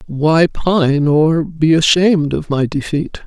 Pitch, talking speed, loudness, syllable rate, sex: 155 Hz, 145 wpm, -14 LUFS, 3.6 syllables/s, female